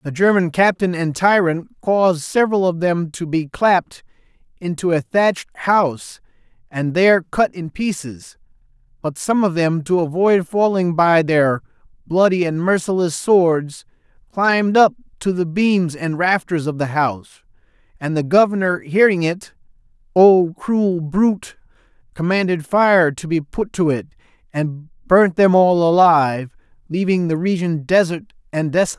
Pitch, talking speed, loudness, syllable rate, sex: 175 Hz, 145 wpm, -17 LUFS, 4.4 syllables/s, male